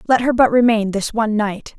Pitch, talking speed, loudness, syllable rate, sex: 225 Hz, 235 wpm, -16 LUFS, 5.6 syllables/s, female